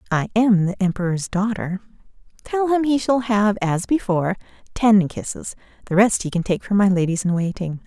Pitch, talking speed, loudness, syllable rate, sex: 200 Hz, 185 wpm, -20 LUFS, 5.1 syllables/s, female